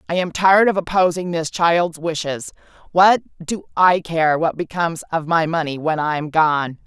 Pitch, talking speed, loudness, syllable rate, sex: 165 Hz, 185 wpm, -18 LUFS, 4.8 syllables/s, female